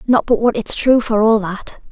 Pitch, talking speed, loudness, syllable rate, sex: 220 Hz, 250 wpm, -15 LUFS, 4.7 syllables/s, female